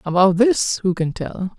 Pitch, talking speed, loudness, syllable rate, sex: 195 Hz, 190 wpm, -18 LUFS, 4.1 syllables/s, female